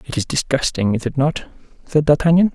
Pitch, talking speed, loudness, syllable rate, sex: 165 Hz, 190 wpm, -18 LUFS, 5.9 syllables/s, female